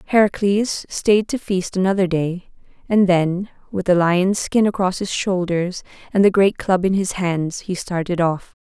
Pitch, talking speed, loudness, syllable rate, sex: 190 Hz, 175 wpm, -19 LUFS, 4.3 syllables/s, female